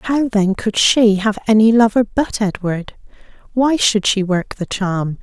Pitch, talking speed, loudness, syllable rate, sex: 210 Hz, 170 wpm, -16 LUFS, 4.0 syllables/s, female